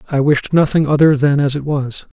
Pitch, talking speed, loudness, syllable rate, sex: 145 Hz, 220 wpm, -14 LUFS, 5.3 syllables/s, male